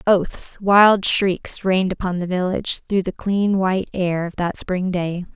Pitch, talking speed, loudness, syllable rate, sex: 185 Hz, 180 wpm, -19 LUFS, 4.1 syllables/s, female